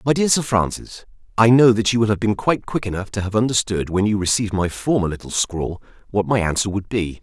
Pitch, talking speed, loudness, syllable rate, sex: 105 Hz, 230 wpm, -19 LUFS, 6.0 syllables/s, male